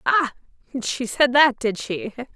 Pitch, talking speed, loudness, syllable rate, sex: 250 Hz, 155 wpm, -21 LUFS, 3.8 syllables/s, female